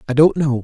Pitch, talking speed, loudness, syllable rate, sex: 140 Hz, 285 wpm, -15 LUFS, 6.4 syllables/s, male